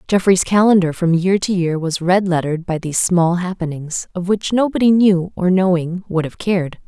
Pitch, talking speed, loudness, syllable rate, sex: 180 Hz, 190 wpm, -17 LUFS, 5.2 syllables/s, female